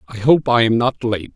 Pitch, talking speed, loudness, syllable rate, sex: 115 Hz, 220 wpm, -16 LUFS, 4.2 syllables/s, male